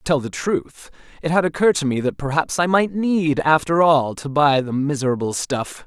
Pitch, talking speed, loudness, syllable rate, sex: 150 Hz, 215 wpm, -19 LUFS, 5.1 syllables/s, male